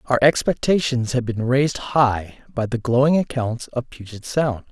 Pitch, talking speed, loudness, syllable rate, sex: 125 Hz, 165 wpm, -20 LUFS, 4.5 syllables/s, male